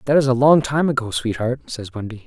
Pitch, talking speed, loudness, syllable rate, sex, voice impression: 125 Hz, 240 wpm, -19 LUFS, 5.8 syllables/s, male, masculine, adult-like, bright, clear, fluent, intellectual, refreshing, slightly calm, friendly, reassuring, unique, lively